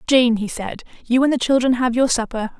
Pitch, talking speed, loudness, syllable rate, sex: 240 Hz, 230 wpm, -18 LUFS, 5.5 syllables/s, female